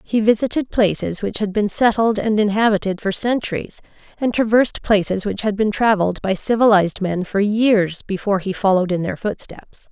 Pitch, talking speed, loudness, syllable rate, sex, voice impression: 205 Hz, 175 wpm, -18 LUFS, 5.4 syllables/s, female, feminine, slightly young, clear, fluent, slightly intellectual, refreshing, slightly lively